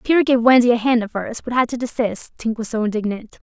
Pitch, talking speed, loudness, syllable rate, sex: 235 Hz, 260 wpm, -19 LUFS, 6.1 syllables/s, female